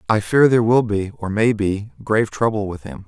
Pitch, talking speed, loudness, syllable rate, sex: 105 Hz, 235 wpm, -19 LUFS, 5.4 syllables/s, male